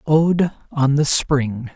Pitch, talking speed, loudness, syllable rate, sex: 145 Hz, 135 wpm, -18 LUFS, 3.5 syllables/s, male